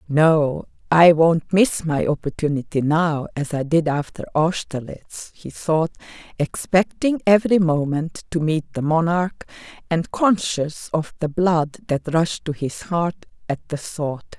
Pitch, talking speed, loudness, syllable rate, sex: 160 Hz, 140 wpm, -20 LUFS, 3.9 syllables/s, female